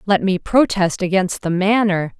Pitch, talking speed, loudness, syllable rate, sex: 190 Hz, 165 wpm, -17 LUFS, 4.4 syllables/s, female